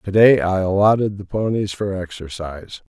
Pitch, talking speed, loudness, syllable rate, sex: 95 Hz, 160 wpm, -19 LUFS, 5.1 syllables/s, male